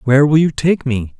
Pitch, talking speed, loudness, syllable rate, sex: 135 Hz, 250 wpm, -14 LUFS, 5.6 syllables/s, male